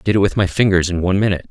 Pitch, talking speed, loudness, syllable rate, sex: 95 Hz, 360 wpm, -16 LUFS, 8.8 syllables/s, male